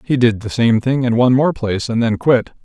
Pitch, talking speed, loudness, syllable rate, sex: 120 Hz, 275 wpm, -16 LUFS, 5.8 syllables/s, male